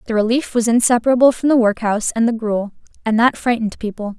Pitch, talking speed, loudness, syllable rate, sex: 230 Hz, 200 wpm, -17 LUFS, 6.5 syllables/s, female